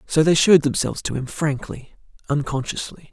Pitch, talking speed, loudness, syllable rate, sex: 150 Hz, 155 wpm, -20 LUFS, 5.7 syllables/s, male